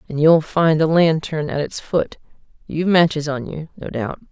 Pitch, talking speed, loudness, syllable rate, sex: 155 Hz, 180 wpm, -18 LUFS, 4.9 syllables/s, female